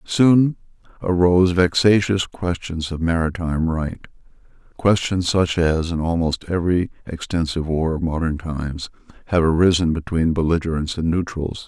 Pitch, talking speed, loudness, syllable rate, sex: 85 Hz, 125 wpm, -20 LUFS, 4.9 syllables/s, male